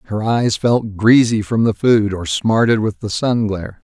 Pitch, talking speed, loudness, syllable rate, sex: 110 Hz, 200 wpm, -16 LUFS, 4.2 syllables/s, male